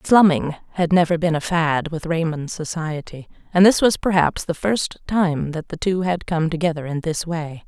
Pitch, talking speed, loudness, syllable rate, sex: 165 Hz, 195 wpm, -20 LUFS, 4.7 syllables/s, female